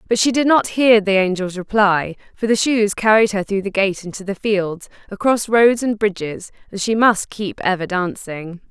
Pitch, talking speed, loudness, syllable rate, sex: 205 Hz, 200 wpm, -17 LUFS, 4.7 syllables/s, female